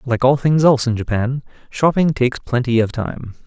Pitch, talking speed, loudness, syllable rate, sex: 130 Hz, 190 wpm, -17 LUFS, 5.3 syllables/s, male